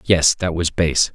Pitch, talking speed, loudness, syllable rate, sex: 85 Hz, 210 wpm, -18 LUFS, 3.8 syllables/s, male